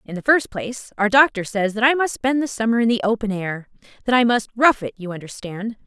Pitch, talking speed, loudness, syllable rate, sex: 220 Hz, 235 wpm, -19 LUFS, 5.8 syllables/s, female